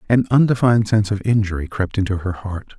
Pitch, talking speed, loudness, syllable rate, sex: 105 Hz, 195 wpm, -18 LUFS, 6.3 syllables/s, male